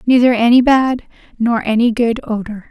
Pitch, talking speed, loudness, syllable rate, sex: 235 Hz, 155 wpm, -14 LUFS, 4.8 syllables/s, female